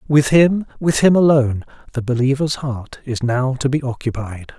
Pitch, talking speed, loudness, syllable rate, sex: 135 Hz, 170 wpm, -17 LUFS, 4.7 syllables/s, male